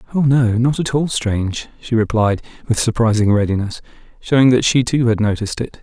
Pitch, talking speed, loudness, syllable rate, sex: 115 Hz, 185 wpm, -17 LUFS, 5.7 syllables/s, male